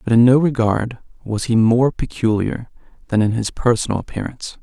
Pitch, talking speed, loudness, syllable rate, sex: 115 Hz, 170 wpm, -18 LUFS, 5.4 syllables/s, male